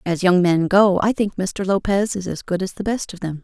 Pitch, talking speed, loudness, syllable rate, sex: 190 Hz, 280 wpm, -19 LUFS, 5.2 syllables/s, female